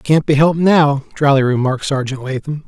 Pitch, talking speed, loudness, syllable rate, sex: 145 Hz, 180 wpm, -15 LUFS, 5.5 syllables/s, male